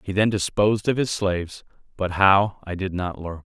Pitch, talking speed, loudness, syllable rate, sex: 95 Hz, 205 wpm, -22 LUFS, 5.0 syllables/s, male